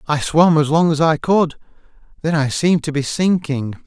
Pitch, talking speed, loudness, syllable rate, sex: 155 Hz, 200 wpm, -17 LUFS, 5.0 syllables/s, male